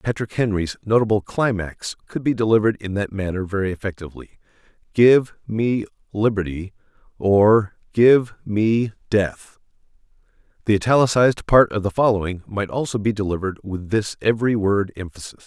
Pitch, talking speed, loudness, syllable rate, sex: 105 Hz, 110 wpm, -20 LUFS, 5.3 syllables/s, male